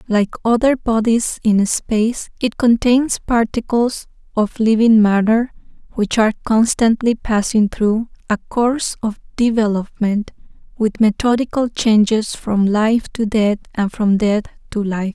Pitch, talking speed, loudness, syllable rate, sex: 220 Hz, 125 wpm, -17 LUFS, 4.2 syllables/s, female